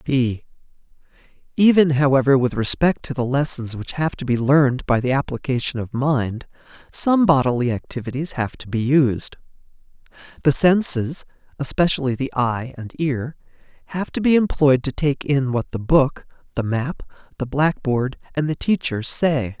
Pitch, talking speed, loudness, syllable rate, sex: 135 Hz, 145 wpm, -20 LUFS, 4.8 syllables/s, male